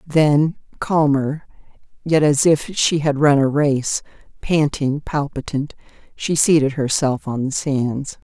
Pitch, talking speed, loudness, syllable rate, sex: 145 Hz, 130 wpm, -18 LUFS, 3.7 syllables/s, female